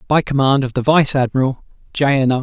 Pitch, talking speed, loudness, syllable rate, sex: 135 Hz, 225 wpm, -16 LUFS, 5.9 syllables/s, male